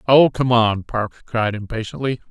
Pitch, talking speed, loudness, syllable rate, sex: 115 Hz, 155 wpm, -19 LUFS, 4.7 syllables/s, male